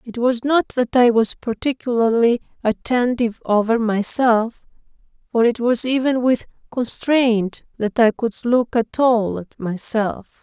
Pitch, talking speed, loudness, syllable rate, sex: 235 Hz, 140 wpm, -19 LUFS, 4.0 syllables/s, female